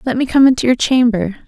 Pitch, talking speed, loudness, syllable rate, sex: 245 Hz, 245 wpm, -13 LUFS, 6.3 syllables/s, female